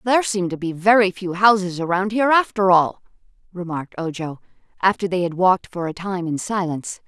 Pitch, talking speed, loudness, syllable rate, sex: 185 Hz, 185 wpm, -20 LUFS, 5.9 syllables/s, female